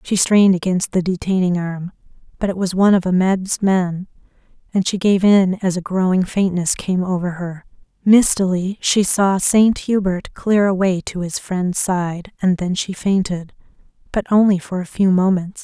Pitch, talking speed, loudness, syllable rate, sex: 185 Hz, 175 wpm, -17 LUFS, 4.6 syllables/s, female